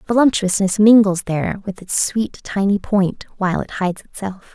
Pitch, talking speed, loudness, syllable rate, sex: 200 Hz, 160 wpm, -18 LUFS, 5.1 syllables/s, female